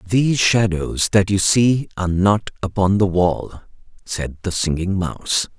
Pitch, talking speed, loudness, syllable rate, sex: 95 Hz, 150 wpm, -18 LUFS, 4.2 syllables/s, male